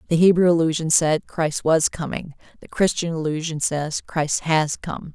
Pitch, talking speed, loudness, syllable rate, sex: 160 Hz, 165 wpm, -21 LUFS, 4.6 syllables/s, female